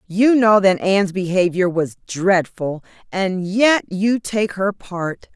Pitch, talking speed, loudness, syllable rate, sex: 190 Hz, 145 wpm, -18 LUFS, 3.5 syllables/s, female